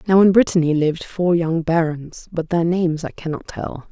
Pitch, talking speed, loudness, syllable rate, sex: 165 Hz, 200 wpm, -19 LUFS, 5.2 syllables/s, female